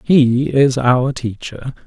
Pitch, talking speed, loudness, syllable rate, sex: 130 Hz, 130 wpm, -15 LUFS, 3.0 syllables/s, male